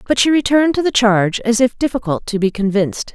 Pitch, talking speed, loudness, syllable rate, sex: 230 Hz, 230 wpm, -16 LUFS, 6.4 syllables/s, female